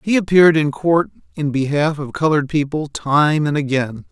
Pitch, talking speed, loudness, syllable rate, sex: 150 Hz, 175 wpm, -17 LUFS, 5.1 syllables/s, male